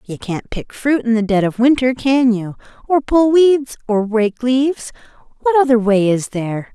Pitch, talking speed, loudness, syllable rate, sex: 240 Hz, 195 wpm, -16 LUFS, 4.5 syllables/s, female